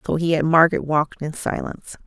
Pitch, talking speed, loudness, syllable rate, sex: 160 Hz, 205 wpm, -20 LUFS, 6.5 syllables/s, female